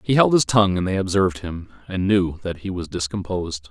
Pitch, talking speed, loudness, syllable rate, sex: 95 Hz, 225 wpm, -21 LUFS, 5.9 syllables/s, male